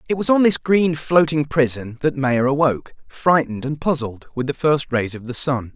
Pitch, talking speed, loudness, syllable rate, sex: 140 Hz, 210 wpm, -19 LUFS, 5.1 syllables/s, male